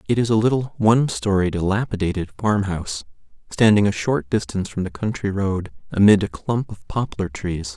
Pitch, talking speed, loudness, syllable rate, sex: 105 Hz, 180 wpm, -21 LUFS, 5.4 syllables/s, male